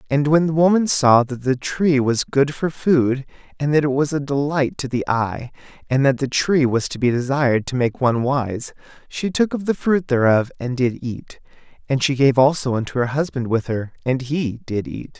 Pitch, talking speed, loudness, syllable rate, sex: 135 Hz, 215 wpm, -19 LUFS, 4.9 syllables/s, male